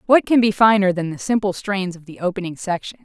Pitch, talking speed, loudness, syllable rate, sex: 195 Hz, 235 wpm, -19 LUFS, 5.9 syllables/s, female